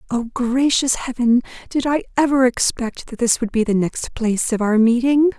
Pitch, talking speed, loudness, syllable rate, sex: 245 Hz, 190 wpm, -18 LUFS, 4.9 syllables/s, female